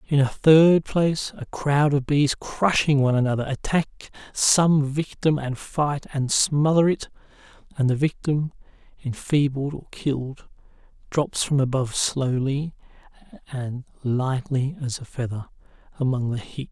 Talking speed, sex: 140 wpm, male